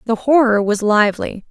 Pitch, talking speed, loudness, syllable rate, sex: 225 Hz, 160 wpm, -15 LUFS, 5.3 syllables/s, female